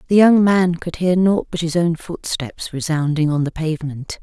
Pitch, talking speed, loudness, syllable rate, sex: 165 Hz, 200 wpm, -18 LUFS, 4.8 syllables/s, female